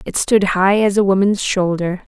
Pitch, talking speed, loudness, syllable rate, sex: 195 Hz, 195 wpm, -16 LUFS, 4.6 syllables/s, female